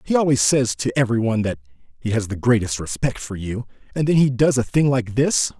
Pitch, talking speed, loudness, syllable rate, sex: 120 Hz, 235 wpm, -20 LUFS, 5.9 syllables/s, male